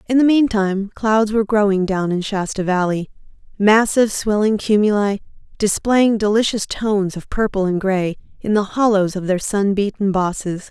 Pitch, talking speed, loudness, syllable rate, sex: 205 Hz, 155 wpm, -18 LUFS, 4.9 syllables/s, female